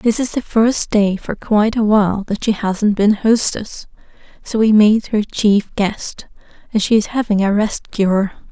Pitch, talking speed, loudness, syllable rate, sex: 210 Hz, 190 wpm, -16 LUFS, 4.3 syllables/s, female